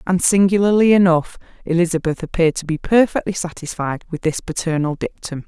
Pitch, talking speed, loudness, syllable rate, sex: 175 Hz, 145 wpm, -18 LUFS, 5.7 syllables/s, female